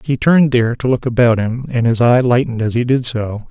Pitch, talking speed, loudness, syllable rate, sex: 120 Hz, 255 wpm, -15 LUFS, 6.0 syllables/s, male